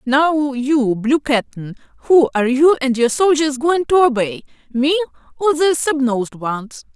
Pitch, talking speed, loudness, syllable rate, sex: 275 Hz, 145 wpm, -16 LUFS, 4.1 syllables/s, female